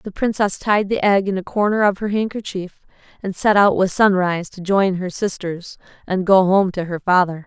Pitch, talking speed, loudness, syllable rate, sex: 190 Hz, 210 wpm, -18 LUFS, 5.0 syllables/s, female